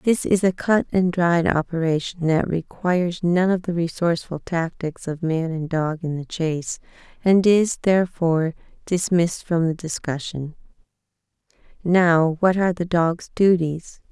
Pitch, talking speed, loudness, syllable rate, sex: 170 Hz, 145 wpm, -21 LUFS, 4.5 syllables/s, female